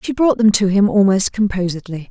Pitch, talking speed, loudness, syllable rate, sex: 200 Hz, 200 wpm, -15 LUFS, 5.5 syllables/s, female